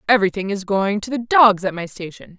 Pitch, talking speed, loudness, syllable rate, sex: 205 Hz, 225 wpm, -18 LUFS, 5.8 syllables/s, female